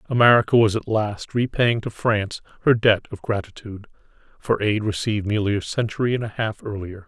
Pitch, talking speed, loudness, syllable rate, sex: 105 Hz, 180 wpm, -21 LUFS, 5.7 syllables/s, male